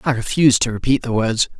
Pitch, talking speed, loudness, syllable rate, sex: 120 Hz, 225 wpm, -17 LUFS, 6.3 syllables/s, male